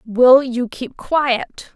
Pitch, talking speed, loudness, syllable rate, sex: 250 Hz, 135 wpm, -16 LUFS, 2.5 syllables/s, female